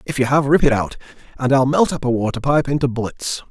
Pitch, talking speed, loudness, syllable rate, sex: 135 Hz, 255 wpm, -18 LUFS, 6.2 syllables/s, male